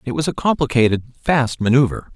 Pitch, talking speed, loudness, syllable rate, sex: 130 Hz, 165 wpm, -18 LUFS, 5.8 syllables/s, male